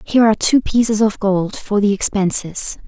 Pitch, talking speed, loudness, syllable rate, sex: 210 Hz, 190 wpm, -16 LUFS, 5.2 syllables/s, female